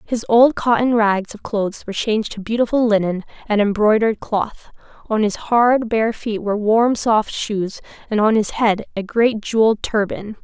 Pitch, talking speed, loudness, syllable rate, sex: 220 Hz, 180 wpm, -18 LUFS, 4.8 syllables/s, female